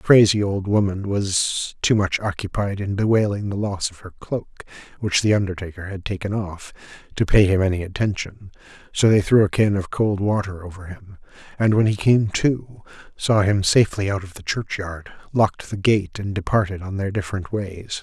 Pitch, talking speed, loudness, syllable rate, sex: 100 Hz, 190 wpm, -21 LUFS, 4.7 syllables/s, male